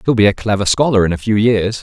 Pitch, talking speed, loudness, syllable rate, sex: 105 Hz, 295 wpm, -14 LUFS, 6.4 syllables/s, male